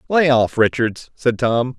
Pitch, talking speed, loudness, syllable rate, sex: 125 Hz, 170 wpm, -18 LUFS, 3.9 syllables/s, male